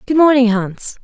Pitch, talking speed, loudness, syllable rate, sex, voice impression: 245 Hz, 175 wpm, -13 LUFS, 4.6 syllables/s, female, very feminine, adult-like, slightly refreshing, sincere, slightly friendly